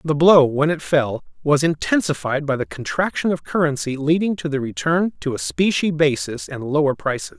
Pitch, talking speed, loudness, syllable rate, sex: 150 Hz, 185 wpm, -20 LUFS, 5.1 syllables/s, male